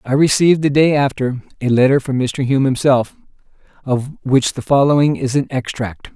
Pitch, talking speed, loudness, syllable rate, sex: 135 Hz, 175 wpm, -16 LUFS, 5.1 syllables/s, male